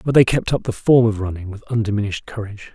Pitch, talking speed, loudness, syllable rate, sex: 110 Hz, 240 wpm, -19 LUFS, 7.0 syllables/s, male